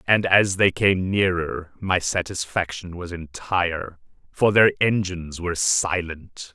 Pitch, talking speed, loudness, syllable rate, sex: 90 Hz, 130 wpm, -22 LUFS, 4.0 syllables/s, male